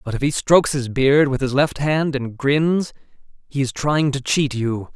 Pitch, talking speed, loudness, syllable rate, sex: 140 Hz, 205 wpm, -19 LUFS, 4.4 syllables/s, male